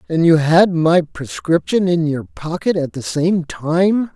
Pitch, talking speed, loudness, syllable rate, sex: 160 Hz, 175 wpm, -16 LUFS, 3.8 syllables/s, male